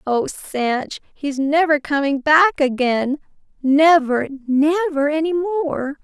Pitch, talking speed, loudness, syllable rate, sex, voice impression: 290 Hz, 110 wpm, -18 LUFS, 3.6 syllables/s, female, feminine, adult-like, slightly bright, slightly fluent, refreshing, friendly